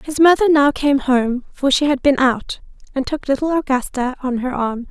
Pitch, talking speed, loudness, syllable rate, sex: 270 Hz, 210 wpm, -17 LUFS, 4.9 syllables/s, female